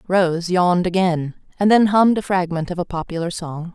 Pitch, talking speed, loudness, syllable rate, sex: 180 Hz, 190 wpm, -19 LUFS, 5.3 syllables/s, female